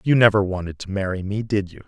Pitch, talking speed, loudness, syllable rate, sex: 100 Hz, 255 wpm, -22 LUFS, 6.2 syllables/s, male